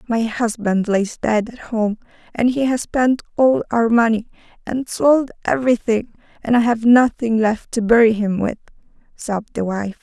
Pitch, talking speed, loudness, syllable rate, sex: 230 Hz, 170 wpm, -18 LUFS, 4.6 syllables/s, female